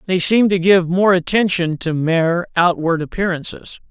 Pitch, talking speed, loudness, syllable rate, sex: 175 Hz, 155 wpm, -16 LUFS, 5.1 syllables/s, male